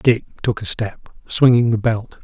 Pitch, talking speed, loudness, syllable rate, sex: 115 Hz, 190 wpm, -18 LUFS, 4.0 syllables/s, male